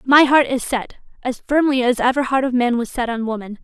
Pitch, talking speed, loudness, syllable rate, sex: 250 Hz, 250 wpm, -18 LUFS, 5.6 syllables/s, female